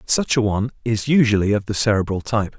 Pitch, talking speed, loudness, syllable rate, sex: 110 Hz, 210 wpm, -19 LUFS, 6.4 syllables/s, male